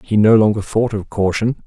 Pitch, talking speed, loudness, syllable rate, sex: 105 Hz, 215 wpm, -16 LUFS, 5.1 syllables/s, male